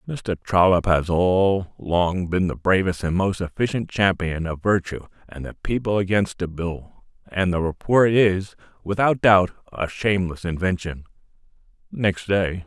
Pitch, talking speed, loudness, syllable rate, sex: 95 Hz, 145 wpm, -21 LUFS, 4.3 syllables/s, male